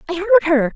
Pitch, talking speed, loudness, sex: 340 Hz, 240 wpm, -15 LUFS, female